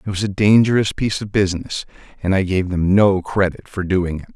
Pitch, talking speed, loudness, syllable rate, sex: 95 Hz, 220 wpm, -18 LUFS, 5.8 syllables/s, male